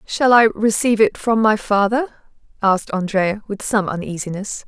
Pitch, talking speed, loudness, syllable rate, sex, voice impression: 210 Hz, 155 wpm, -18 LUFS, 5.2 syllables/s, female, very feminine, young, slightly adult-like, thin, very tensed, slightly powerful, bright, hard, very clear, very fluent, cute, slightly cool, refreshing, sincere, friendly, reassuring, slightly unique, slightly wild, slightly sweet, very lively, slightly strict, slightly intense